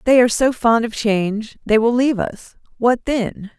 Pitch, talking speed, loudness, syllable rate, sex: 230 Hz, 200 wpm, -18 LUFS, 4.8 syllables/s, female